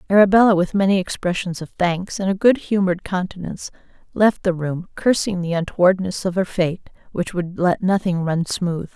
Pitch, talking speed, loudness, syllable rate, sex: 185 Hz, 175 wpm, -20 LUFS, 5.2 syllables/s, female